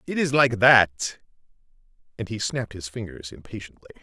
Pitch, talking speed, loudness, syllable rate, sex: 110 Hz, 150 wpm, -22 LUFS, 5.4 syllables/s, male